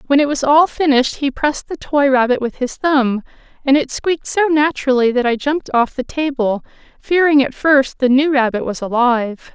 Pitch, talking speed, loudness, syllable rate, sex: 270 Hz, 200 wpm, -16 LUFS, 5.4 syllables/s, female